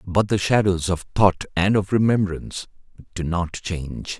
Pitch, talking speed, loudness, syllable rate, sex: 95 Hz, 155 wpm, -21 LUFS, 4.6 syllables/s, male